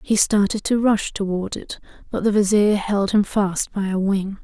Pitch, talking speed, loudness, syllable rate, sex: 200 Hz, 205 wpm, -20 LUFS, 4.5 syllables/s, female